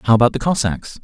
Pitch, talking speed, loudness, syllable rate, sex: 120 Hz, 235 wpm, -17 LUFS, 6.1 syllables/s, male